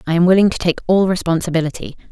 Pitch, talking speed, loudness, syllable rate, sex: 175 Hz, 200 wpm, -16 LUFS, 7.3 syllables/s, female